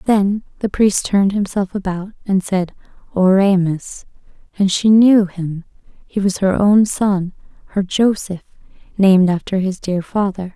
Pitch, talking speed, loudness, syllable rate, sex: 195 Hz, 130 wpm, -16 LUFS, 4.4 syllables/s, female